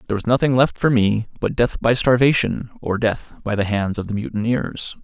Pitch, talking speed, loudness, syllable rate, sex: 115 Hz, 215 wpm, -20 LUFS, 5.3 syllables/s, male